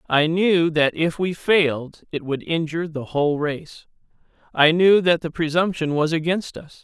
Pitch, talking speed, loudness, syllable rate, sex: 160 Hz, 175 wpm, -20 LUFS, 4.6 syllables/s, male